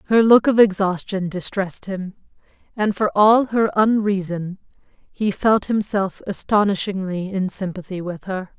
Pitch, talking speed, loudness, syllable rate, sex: 195 Hz, 135 wpm, -20 LUFS, 4.4 syllables/s, female